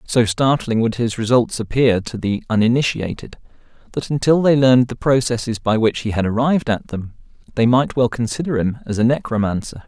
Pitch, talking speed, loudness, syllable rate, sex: 120 Hz, 180 wpm, -18 LUFS, 5.5 syllables/s, male